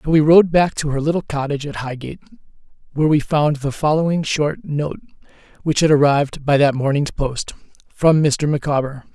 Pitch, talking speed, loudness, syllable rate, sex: 150 Hz, 175 wpm, -18 LUFS, 5.5 syllables/s, male